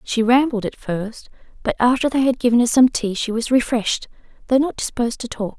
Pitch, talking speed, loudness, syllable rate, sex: 240 Hz, 215 wpm, -19 LUFS, 5.7 syllables/s, female